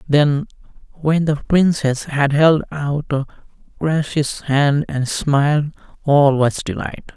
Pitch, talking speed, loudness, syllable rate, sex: 145 Hz, 125 wpm, -18 LUFS, 3.5 syllables/s, male